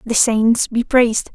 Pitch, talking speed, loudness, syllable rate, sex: 235 Hz, 180 wpm, -15 LUFS, 4.0 syllables/s, female